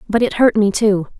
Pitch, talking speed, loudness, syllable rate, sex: 210 Hz, 250 wpm, -15 LUFS, 5.4 syllables/s, female